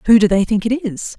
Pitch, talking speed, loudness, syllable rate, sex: 215 Hz, 305 wpm, -16 LUFS, 5.9 syllables/s, female